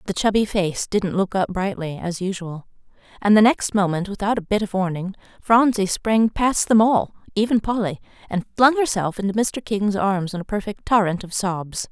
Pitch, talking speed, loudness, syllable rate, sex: 200 Hz, 195 wpm, -21 LUFS, 5.1 syllables/s, female